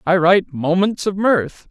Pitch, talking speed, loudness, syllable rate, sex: 185 Hz, 175 wpm, -17 LUFS, 4.4 syllables/s, male